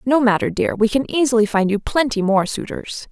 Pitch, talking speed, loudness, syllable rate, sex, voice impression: 225 Hz, 210 wpm, -18 LUFS, 5.3 syllables/s, female, feminine, adult-like, tensed, powerful, clear, fluent, intellectual, elegant, lively, slightly strict, slightly sharp